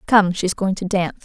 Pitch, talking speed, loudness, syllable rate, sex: 190 Hz, 240 wpm, -19 LUFS, 5.6 syllables/s, female